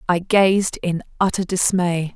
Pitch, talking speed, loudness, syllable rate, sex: 180 Hz, 140 wpm, -19 LUFS, 3.9 syllables/s, female